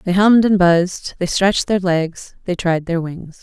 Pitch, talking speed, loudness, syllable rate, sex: 180 Hz, 210 wpm, -16 LUFS, 4.7 syllables/s, female